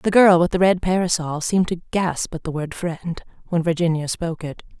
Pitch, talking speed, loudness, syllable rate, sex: 170 Hz, 215 wpm, -21 LUFS, 5.7 syllables/s, female